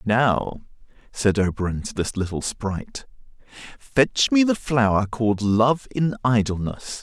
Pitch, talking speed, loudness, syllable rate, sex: 115 Hz, 130 wpm, -22 LUFS, 4.2 syllables/s, male